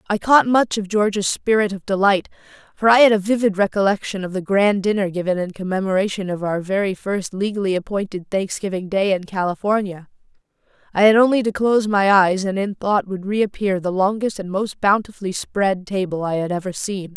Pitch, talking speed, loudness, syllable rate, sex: 195 Hz, 190 wpm, -19 LUFS, 5.5 syllables/s, female